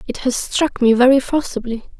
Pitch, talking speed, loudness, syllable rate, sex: 255 Hz, 180 wpm, -16 LUFS, 5.1 syllables/s, female